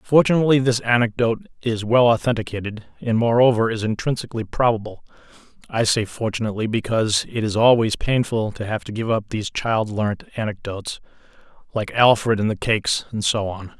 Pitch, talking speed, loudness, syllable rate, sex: 115 Hz, 155 wpm, -20 LUFS, 5.8 syllables/s, male